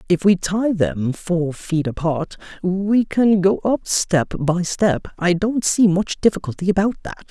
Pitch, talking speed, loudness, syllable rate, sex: 180 Hz, 170 wpm, -19 LUFS, 3.9 syllables/s, male